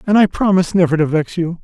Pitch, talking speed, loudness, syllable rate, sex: 175 Hz, 260 wpm, -15 LUFS, 6.6 syllables/s, male